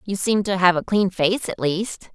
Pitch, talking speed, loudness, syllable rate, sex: 190 Hz, 250 wpm, -21 LUFS, 4.5 syllables/s, female